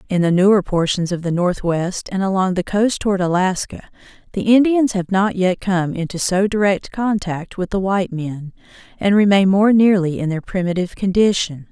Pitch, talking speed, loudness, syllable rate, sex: 190 Hz, 180 wpm, -17 LUFS, 5.1 syllables/s, female